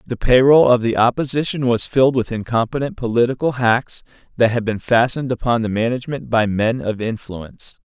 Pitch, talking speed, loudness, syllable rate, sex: 120 Hz, 175 wpm, -18 LUFS, 5.6 syllables/s, male